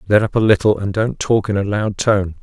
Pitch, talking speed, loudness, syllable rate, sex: 100 Hz, 270 wpm, -17 LUFS, 5.5 syllables/s, male